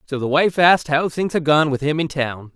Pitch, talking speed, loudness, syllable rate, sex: 150 Hz, 280 wpm, -18 LUFS, 5.5 syllables/s, male